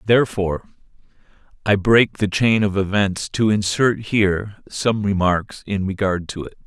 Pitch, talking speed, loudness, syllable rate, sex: 100 Hz, 145 wpm, -19 LUFS, 4.5 syllables/s, male